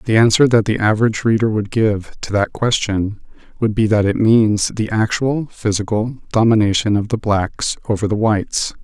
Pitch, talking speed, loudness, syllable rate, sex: 110 Hz, 175 wpm, -17 LUFS, 5.1 syllables/s, male